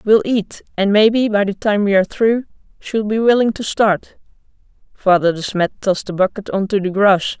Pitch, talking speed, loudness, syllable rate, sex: 205 Hz, 205 wpm, -16 LUFS, 5.2 syllables/s, female